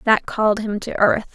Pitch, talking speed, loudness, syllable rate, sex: 215 Hz, 225 wpm, -19 LUFS, 5.0 syllables/s, female